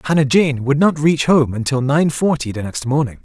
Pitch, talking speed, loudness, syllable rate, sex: 140 Hz, 220 wpm, -16 LUFS, 5.3 syllables/s, male